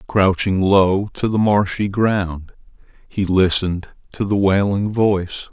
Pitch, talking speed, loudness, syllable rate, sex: 95 Hz, 130 wpm, -18 LUFS, 3.9 syllables/s, male